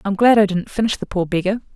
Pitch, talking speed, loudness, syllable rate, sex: 200 Hz, 275 wpm, -18 LUFS, 6.5 syllables/s, female